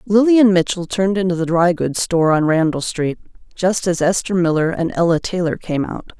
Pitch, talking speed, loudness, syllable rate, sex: 175 Hz, 195 wpm, -17 LUFS, 5.3 syllables/s, female